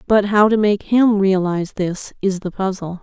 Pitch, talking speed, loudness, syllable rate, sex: 195 Hz, 200 wpm, -17 LUFS, 4.6 syllables/s, female